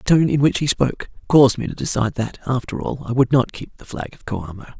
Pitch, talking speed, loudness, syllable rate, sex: 130 Hz, 265 wpm, -20 LUFS, 6.3 syllables/s, male